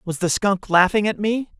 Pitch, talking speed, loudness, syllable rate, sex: 195 Hz, 225 wpm, -19 LUFS, 4.8 syllables/s, male